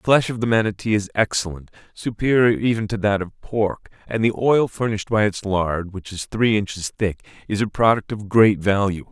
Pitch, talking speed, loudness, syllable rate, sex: 105 Hz, 205 wpm, -21 LUFS, 5.2 syllables/s, male